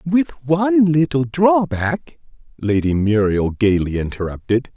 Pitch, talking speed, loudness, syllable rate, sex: 135 Hz, 100 wpm, -18 LUFS, 4.0 syllables/s, male